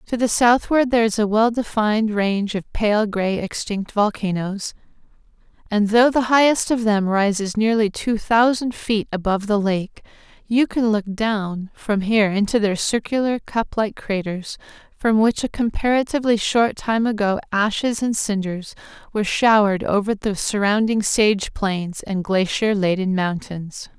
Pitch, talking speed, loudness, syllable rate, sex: 210 Hz, 155 wpm, -20 LUFS, 4.5 syllables/s, female